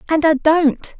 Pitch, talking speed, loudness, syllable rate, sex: 310 Hz, 180 wpm, -15 LUFS, 3.7 syllables/s, female